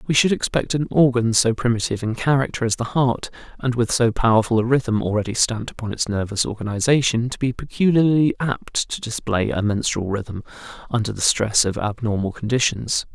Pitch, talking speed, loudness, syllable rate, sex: 120 Hz, 180 wpm, -20 LUFS, 5.5 syllables/s, male